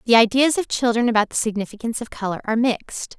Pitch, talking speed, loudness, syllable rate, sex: 230 Hz, 205 wpm, -20 LUFS, 7.0 syllables/s, female